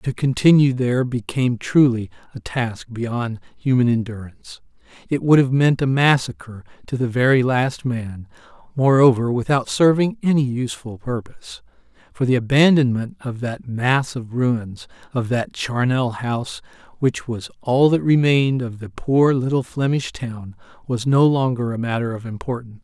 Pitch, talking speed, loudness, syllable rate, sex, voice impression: 125 Hz, 150 wpm, -19 LUFS, 4.7 syllables/s, male, masculine, middle-aged, slightly powerful, clear, cool, intellectual, slightly friendly, slightly wild